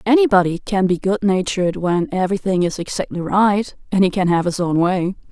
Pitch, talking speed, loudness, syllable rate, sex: 190 Hz, 180 wpm, -18 LUFS, 5.5 syllables/s, female